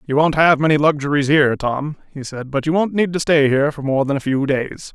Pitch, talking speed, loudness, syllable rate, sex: 145 Hz, 265 wpm, -17 LUFS, 5.8 syllables/s, male